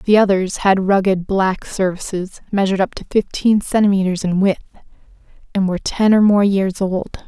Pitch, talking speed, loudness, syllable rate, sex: 195 Hz, 165 wpm, -17 LUFS, 5.0 syllables/s, female